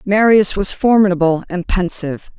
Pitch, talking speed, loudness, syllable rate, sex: 190 Hz, 125 wpm, -15 LUFS, 5.0 syllables/s, female